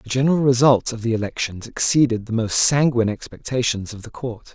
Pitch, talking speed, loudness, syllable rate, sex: 120 Hz, 185 wpm, -20 LUFS, 5.8 syllables/s, male